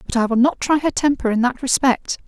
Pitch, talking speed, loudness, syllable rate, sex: 260 Hz, 265 wpm, -18 LUFS, 5.7 syllables/s, female